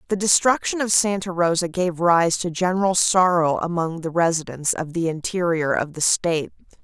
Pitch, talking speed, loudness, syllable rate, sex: 175 Hz, 165 wpm, -20 LUFS, 5.1 syllables/s, female